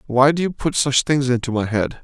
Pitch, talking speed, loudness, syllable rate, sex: 135 Hz, 265 wpm, -19 LUFS, 5.4 syllables/s, male